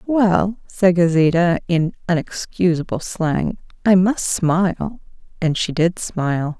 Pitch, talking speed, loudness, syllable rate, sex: 175 Hz, 120 wpm, -19 LUFS, 3.8 syllables/s, female